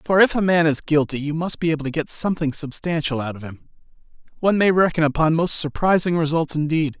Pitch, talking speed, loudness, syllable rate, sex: 160 Hz, 215 wpm, -20 LUFS, 6.2 syllables/s, male